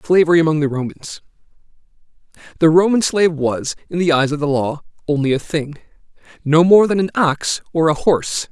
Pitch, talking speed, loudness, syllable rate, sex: 160 Hz, 160 wpm, -16 LUFS, 5.6 syllables/s, male